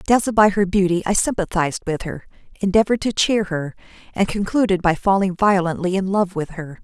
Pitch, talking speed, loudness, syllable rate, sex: 190 Hz, 185 wpm, -19 LUFS, 5.8 syllables/s, female